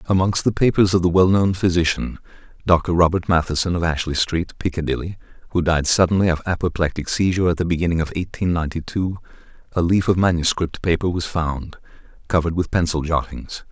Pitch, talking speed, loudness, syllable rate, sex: 85 Hz, 165 wpm, -20 LUFS, 5.9 syllables/s, male